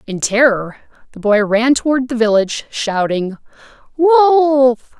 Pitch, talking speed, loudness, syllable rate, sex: 245 Hz, 120 wpm, -14 LUFS, 3.9 syllables/s, female